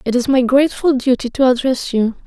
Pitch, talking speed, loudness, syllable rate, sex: 255 Hz, 210 wpm, -15 LUFS, 5.7 syllables/s, female